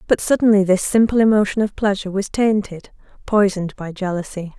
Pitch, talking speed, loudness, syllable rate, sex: 200 Hz, 155 wpm, -18 LUFS, 5.9 syllables/s, female